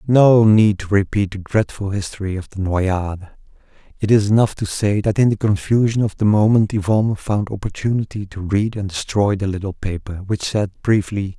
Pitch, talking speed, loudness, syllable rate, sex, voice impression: 100 Hz, 185 wpm, -18 LUFS, 5.2 syllables/s, male, very masculine, very middle-aged, relaxed, weak, dark, very soft, muffled, fluent, slightly raspy, cool, very intellectual, refreshing, sincere, very calm, very mature, very friendly, very reassuring, very unique, very elegant, wild, very sweet, slightly lively, very kind, very modest